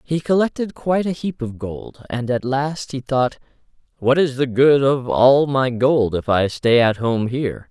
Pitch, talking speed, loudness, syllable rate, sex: 135 Hz, 200 wpm, -19 LUFS, 4.3 syllables/s, male